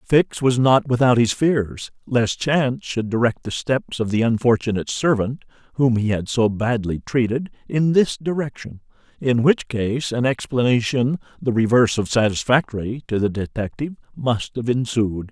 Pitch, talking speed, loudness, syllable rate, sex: 120 Hz, 155 wpm, -20 LUFS, 4.8 syllables/s, male